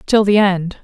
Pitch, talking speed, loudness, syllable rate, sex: 195 Hz, 215 wpm, -14 LUFS, 4.2 syllables/s, female